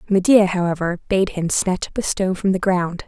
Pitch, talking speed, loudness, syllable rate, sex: 185 Hz, 215 wpm, -19 LUFS, 5.3 syllables/s, female